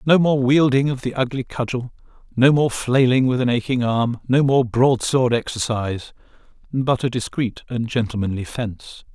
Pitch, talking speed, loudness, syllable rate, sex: 125 Hz, 155 wpm, -20 LUFS, 4.9 syllables/s, male